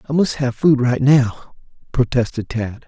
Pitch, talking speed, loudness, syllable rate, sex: 125 Hz, 165 wpm, -18 LUFS, 4.8 syllables/s, male